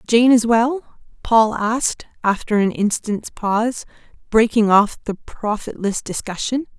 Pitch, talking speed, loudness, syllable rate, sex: 220 Hz, 125 wpm, -19 LUFS, 4.1 syllables/s, female